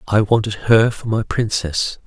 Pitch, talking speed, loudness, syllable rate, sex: 105 Hz, 175 wpm, -18 LUFS, 4.3 syllables/s, male